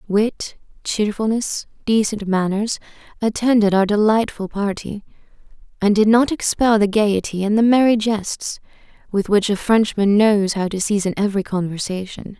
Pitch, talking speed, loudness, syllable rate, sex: 205 Hz, 135 wpm, -18 LUFS, 4.7 syllables/s, female